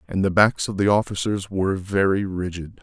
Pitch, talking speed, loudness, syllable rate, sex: 95 Hz, 190 wpm, -22 LUFS, 5.3 syllables/s, male